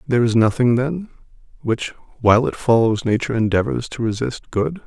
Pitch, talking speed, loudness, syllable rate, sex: 120 Hz, 160 wpm, -19 LUFS, 5.6 syllables/s, male